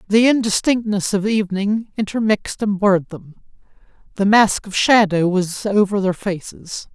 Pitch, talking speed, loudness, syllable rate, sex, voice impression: 200 Hz, 140 wpm, -18 LUFS, 4.7 syllables/s, male, masculine, adult-like, tensed, slightly weak, slightly bright, slightly soft, raspy, friendly, unique, slightly lively, slightly modest